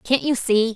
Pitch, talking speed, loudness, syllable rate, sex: 240 Hz, 240 wpm, -20 LUFS, 4.2 syllables/s, female